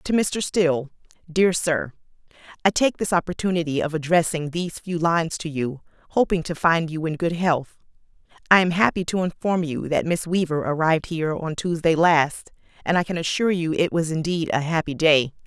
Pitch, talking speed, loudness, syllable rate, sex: 165 Hz, 180 wpm, -22 LUFS, 5.3 syllables/s, female